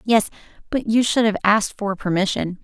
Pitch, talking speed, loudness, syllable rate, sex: 210 Hz, 180 wpm, -20 LUFS, 5.4 syllables/s, female